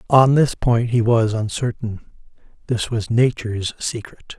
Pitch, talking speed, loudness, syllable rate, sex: 115 Hz, 135 wpm, -19 LUFS, 4.3 syllables/s, male